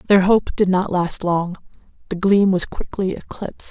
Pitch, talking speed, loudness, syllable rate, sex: 190 Hz, 180 wpm, -19 LUFS, 4.5 syllables/s, female